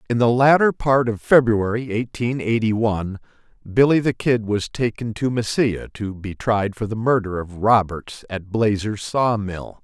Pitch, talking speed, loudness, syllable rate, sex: 110 Hz, 170 wpm, -20 LUFS, 4.5 syllables/s, male